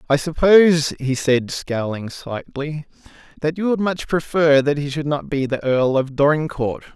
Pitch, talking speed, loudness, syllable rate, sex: 145 Hz, 170 wpm, -19 LUFS, 4.5 syllables/s, male